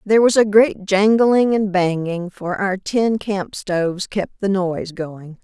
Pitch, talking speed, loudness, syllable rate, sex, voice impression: 195 Hz, 175 wpm, -18 LUFS, 4.0 syllables/s, female, feminine, adult-like, slightly intellectual, elegant, slightly sweet